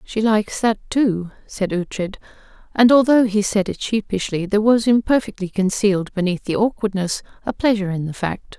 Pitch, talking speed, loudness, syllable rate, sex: 205 Hz, 170 wpm, -19 LUFS, 5.4 syllables/s, female